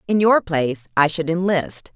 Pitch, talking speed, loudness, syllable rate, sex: 165 Hz, 185 wpm, -19 LUFS, 4.9 syllables/s, female